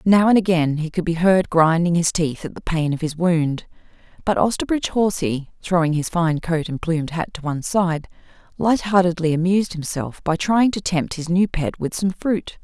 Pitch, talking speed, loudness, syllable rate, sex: 170 Hz, 200 wpm, -20 LUFS, 5.0 syllables/s, female